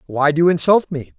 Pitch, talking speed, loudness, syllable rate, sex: 155 Hz, 255 wpm, -16 LUFS, 6.0 syllables/s, male